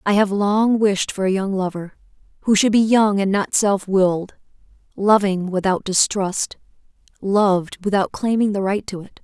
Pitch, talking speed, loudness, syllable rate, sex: 200 Hz, 170 wpm, -19 LUFS, 4.6 syllables/s, female